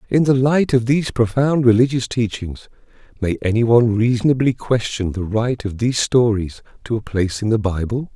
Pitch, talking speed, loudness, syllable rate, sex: 115 Hz, 175 wpm, -18 LUFS, 5.4 syllables/s, male